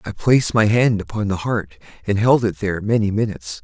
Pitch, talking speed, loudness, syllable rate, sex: 100 Hz, 215 wpm, -19 LUFS, 5.8 syllables/s, male